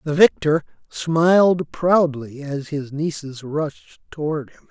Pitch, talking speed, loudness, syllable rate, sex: 155 Hz, 130 wpm, -20 LUFS, 3.6 syllables/s, male